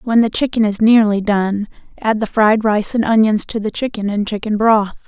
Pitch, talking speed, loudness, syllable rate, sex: 215 Hz, 215 wpm, -16 LUFS, 4.9 syllables/s, female